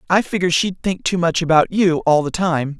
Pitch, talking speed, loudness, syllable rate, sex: 170 Hz, 235 wpm, -17 LUFS, 5.4 syllables/s, male